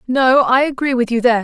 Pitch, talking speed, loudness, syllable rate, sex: 255 Hz, 250 wpm, -14 LUFS, 6.1 syllables/s, female